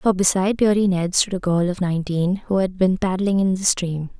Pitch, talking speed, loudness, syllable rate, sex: 185 Hz, 230 wpm, -20 LUFS, 5.4 syllables/s, female